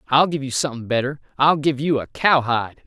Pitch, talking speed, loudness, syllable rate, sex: 135 Hz, 210 wpm, -20 LUFS, 5.9 syllables/s, male